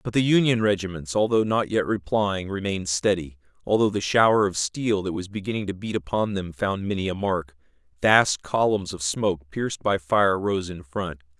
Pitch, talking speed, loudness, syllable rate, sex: 95 Hz, 190 wpm, -24 LUFS, 5.2 syllables/s, male